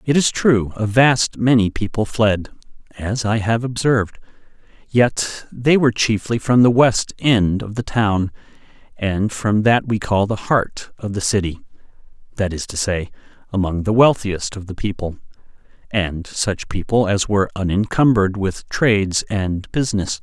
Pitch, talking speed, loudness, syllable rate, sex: 105 Hz, 155 wpm, -18 LUFS, 4.4 syllables/s, male